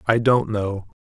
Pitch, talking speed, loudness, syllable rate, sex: 110 Hz, 175 wpm, -21 LUFS, 3.9 syllables/s, male